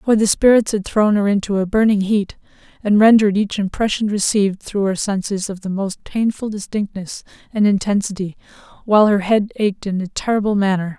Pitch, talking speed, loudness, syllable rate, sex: 205 Hz, 180 wpm, -17 LUFS, 5.5 syllables/s, female